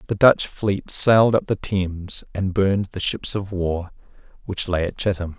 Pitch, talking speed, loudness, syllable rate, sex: 95 Hz, 190 wpm, -21 LUFS, 4.6 syllables/s, male